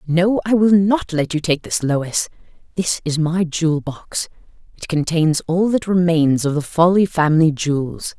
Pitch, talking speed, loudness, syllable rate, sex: 165 Hz, 170 wpm, -18 LUFS, 4.4 syllables/s, female